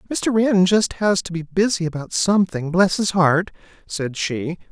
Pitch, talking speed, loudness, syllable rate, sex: 180 Hz, 180 wpm, -19 LUFS, 4.5 syllables/s, male